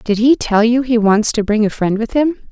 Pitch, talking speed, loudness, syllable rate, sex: 230 Hz, 285 wpm, -14 LUFS, 5.2 syllables/s, female